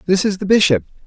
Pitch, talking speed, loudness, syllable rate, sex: 180 Hz, 225 wpm, -16 LUFS, 7.1 syllables/s, male